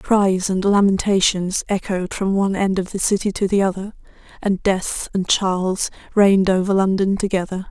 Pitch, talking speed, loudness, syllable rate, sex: 190 Hz, 165 wpm, -19 LUFS, 4.9 syllables/s, female